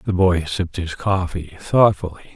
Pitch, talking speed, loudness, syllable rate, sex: 90 Hz, 155 wpm, -19 LUFS, 5.0 syllables/s, male